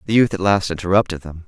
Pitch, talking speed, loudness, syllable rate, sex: 95 Hz, 245 wpm, -18 LUFS, 6.9 syllables/s, male